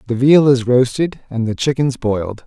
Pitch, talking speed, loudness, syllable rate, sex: 125 Hz, 195 wpm, -16 LUFS, 5.0 syllables/s, male